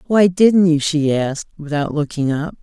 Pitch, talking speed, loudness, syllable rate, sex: 160 Hz, 185 wpm, -17 LUFS, 4.7 syllables/s, female